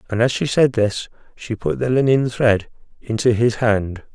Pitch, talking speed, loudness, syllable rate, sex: 115 Hz, 190 wpm, -18 LUFS, 4.5 syllables/s, male